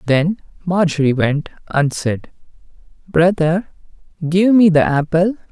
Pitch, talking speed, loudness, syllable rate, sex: 165 Hz, 110 wpm, -16 LUFS, 3.9 syllables/s, male